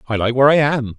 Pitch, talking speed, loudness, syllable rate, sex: 130 Hz, 305 wpm, -15 LUFS, 7.1 syllables/s, male